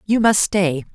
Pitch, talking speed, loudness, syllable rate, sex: 190 Hz, 190 wpm, -17 LUFS, 3.9 syllables/s, female